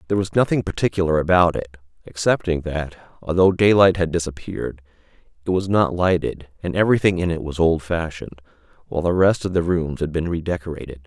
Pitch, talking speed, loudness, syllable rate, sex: 85 Hz, 170 wpm, -20 LUFS, 6.1 syllables/s, male